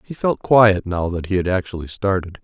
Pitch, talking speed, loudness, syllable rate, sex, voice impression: 95 Hz, 220 wpm, -18 LUFS, 5.3 syllables/s, male, very masculine, very adult-like, slightly old, very thick, slightly tensed, very powerful, bright, soft, very clear, very fluent, slightly raspy, very cool, intellectual, slightly refreshing, sincere, very calm, very mature, very friendly, very reassuring, very unique, very elegant, wild, very sweet, lively, very kind, slightly intense, slightly modest